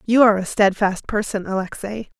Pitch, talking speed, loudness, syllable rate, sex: 205 Hz, 165 wpm, -20 LUFS, 5.6 syllables/s, female